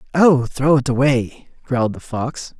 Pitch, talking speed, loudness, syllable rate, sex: 135 Hz, 160 wpm, -18 LUFS, 4.4 syllables/s, male